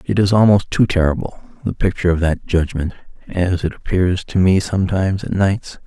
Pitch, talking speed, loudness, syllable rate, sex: 90 Hz, 185 wpm, -18 LUFS, 5.6 syllables/s, male